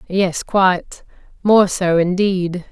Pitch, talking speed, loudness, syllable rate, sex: 185 Hz, 90 wpm, -16 LUFS, 3.3 syllables/s, female